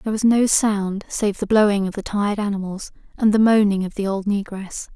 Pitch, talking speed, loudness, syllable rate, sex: 205 Hz, 220 wpm, -20 LUFS, 5.5 syllables/s, female